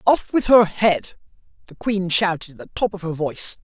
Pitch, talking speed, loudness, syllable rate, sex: 190 Hz, 210 wpm, -20 LUFS, 5.1 syllables/s, male